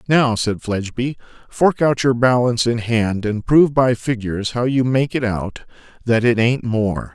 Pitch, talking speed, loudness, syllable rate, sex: 120 Hz, 185 wpm, -18 LUFS, 4.7 syllables/s, male